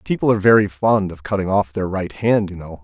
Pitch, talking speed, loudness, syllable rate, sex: 100 Hz, 255 wpm, -18 LUFS, 5.9 syllables/s, male